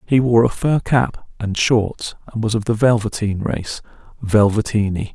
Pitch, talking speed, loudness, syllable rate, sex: 110 Hz, 165 wpm, -18 LUFS, 4.3 syllables/s, male